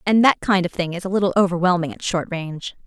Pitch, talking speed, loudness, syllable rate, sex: 180 Hz, 250 wpm, -20 LUFS, 6.5 syllables/s, female